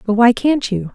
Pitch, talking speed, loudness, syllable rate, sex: 230 Hz, 255 wpm, -15 LUFS, 4.7 syllables/s, female